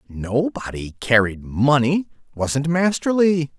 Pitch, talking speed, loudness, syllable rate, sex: 140 Hz, 85 wpm, -20 LUFS, 3.6 syllables/s, male